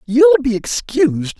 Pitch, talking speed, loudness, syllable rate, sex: 210 Hz, 130 wpm, -15 LUFS, 4.2 syllables/s, male